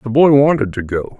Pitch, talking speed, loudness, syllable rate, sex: 125 Hz, 250 wpm, -14 LUFS, 5.5 syllables/s, male